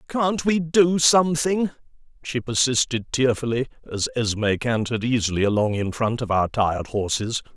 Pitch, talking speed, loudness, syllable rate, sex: 125 Hz, 145 wpm, -22 LUFS, 5.0 syllables/s, male